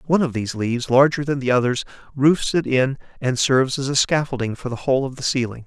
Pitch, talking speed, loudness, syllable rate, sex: 130 Hz, 235 wpm, -20 LUFS, 6.3 syllables/s, male